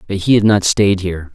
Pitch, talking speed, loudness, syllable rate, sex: 95 Hz, 265 wpm, -14 LUFS, 5.9 syllables/s, male